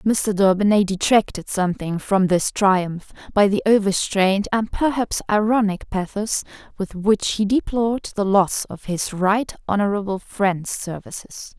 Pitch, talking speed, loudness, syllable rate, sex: 200 Hz, 135 wpm, -20 LUFS, 4.3 syllables/s, female